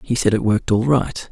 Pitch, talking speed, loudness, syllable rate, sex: 115 Hz, 275 wpm, -18 LUFS, 5.8 syllables/s, male